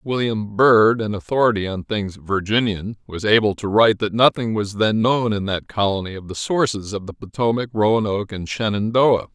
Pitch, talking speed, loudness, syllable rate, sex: 105 Hz, 180 wpm, -19 LUFS, 5.0 syllables/s, male